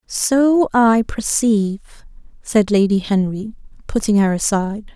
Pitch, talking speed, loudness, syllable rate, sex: 215 Hz, 110 wpm, -17 LUFS, 3.9 syllables/s, female